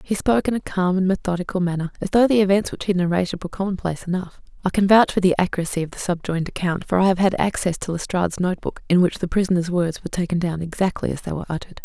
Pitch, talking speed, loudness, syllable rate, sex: 180 Hz, 255 wpm, -21 LUFS, 7.2 syllables/s, female